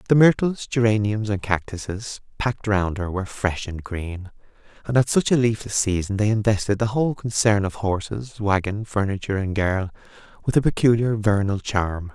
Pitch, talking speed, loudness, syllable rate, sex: 105 Hz, 170 wpm, -22 LUFS, 5.2 syllables/s, male